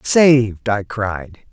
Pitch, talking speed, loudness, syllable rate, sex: 115 Hz, 120 wpm, -16 LUFS, 2.9 syllables/s, male